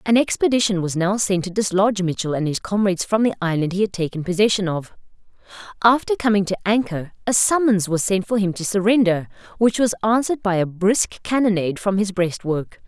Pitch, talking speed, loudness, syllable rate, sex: 200 Hz, 190 wpm, -20 LUFS, 5.8 syllables/s, female